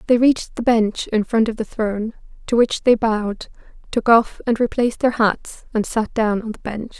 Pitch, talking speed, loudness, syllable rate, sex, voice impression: 225 Hz, 215 wpm, -19 LUFS, 5.1 syllables/s, female, very feminine, young, very thin, relaxed, weak, slightly dark, very soft, very clear, muffled, fluent, slightly raspy, very cute, intellectual, refreshing, very sincere, very calm, very friendly, very reassuring, very unique, very elegant, very sweet, slightly lively, very kind, very modest, very light